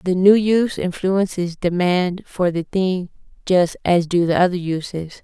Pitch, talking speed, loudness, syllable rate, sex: 180 Hz, 160 wpm, -19 LUFS, 4.3 syllables/s, female